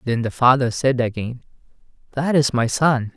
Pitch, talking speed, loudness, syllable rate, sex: 125 Hz, 170 wpm, -19 LUFS, 5.2 syllables/s, male